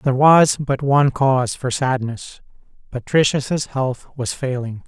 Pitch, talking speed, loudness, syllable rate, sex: 135 Hz, 125 wpm, -18 LUFS, 4.2 syllables/s, male